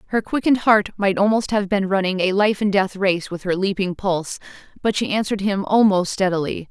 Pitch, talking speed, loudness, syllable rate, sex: 195 Hz, 205 wpm, -20 LUFS, 5.7 syllables/s, female